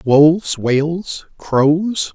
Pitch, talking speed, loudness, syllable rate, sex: 160 Hz, 85 wpm, -16 LUFS, 2.6 syllables/s, male